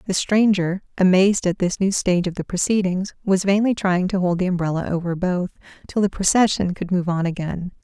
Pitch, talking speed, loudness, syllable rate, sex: 185 Hz, 200 wpm, -20 LUFS, 5.6 syllables/s, female